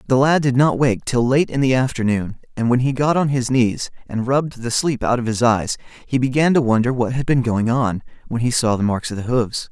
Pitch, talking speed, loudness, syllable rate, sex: 125 Hz, 255 wpm, -19 LUFS, 5.3 syllables/s, male